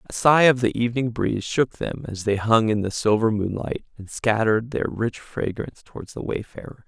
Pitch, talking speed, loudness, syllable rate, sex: 115 Hz, 200 wpm, -23 LUFS, 5.4 syllables/s, male